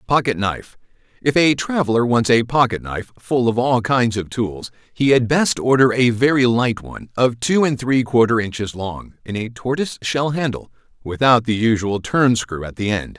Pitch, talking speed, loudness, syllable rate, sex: 120 Hz, 185 wpm, -18 LUFS, 5.0 syllables/s, male